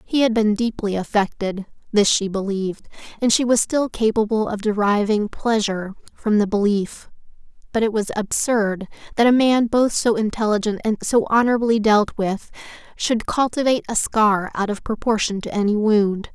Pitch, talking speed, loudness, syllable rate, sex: 215 Hz, 160 wpm, -20 LUFS, 5.0 syllables/s, female